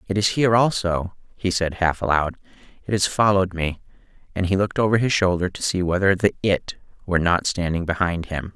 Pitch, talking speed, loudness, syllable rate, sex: 95 Hz, 195 wpm, -21 LUFS, 5.8 syllables/s, male